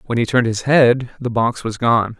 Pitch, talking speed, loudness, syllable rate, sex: 120 Hz, 245 wpm, -17 LUFS, 5.2 syllables/s, male